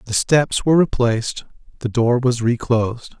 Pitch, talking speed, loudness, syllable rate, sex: 120 Hz, 150 wpm, -18 LUFS, 4.9 syllables/s, male